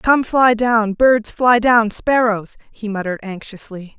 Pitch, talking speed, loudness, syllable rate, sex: 225 Hz, 150 wpm, -16 LUFS, 4.0 syllables/s, female